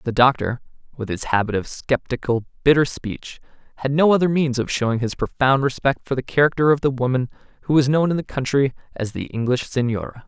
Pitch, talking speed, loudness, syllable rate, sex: 130 Hz, 200 wpm, -20 LUFS, 5.8 syllables/s, male